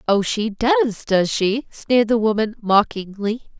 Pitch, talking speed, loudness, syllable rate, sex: 220 Hz, 150 wpm, -19 LUFS, 4.0 syllables/s, female